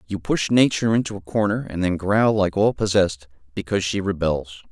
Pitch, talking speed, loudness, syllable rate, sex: 100 Hz, 190 wpm, -21 LUFS, 5.9 syllables/s, male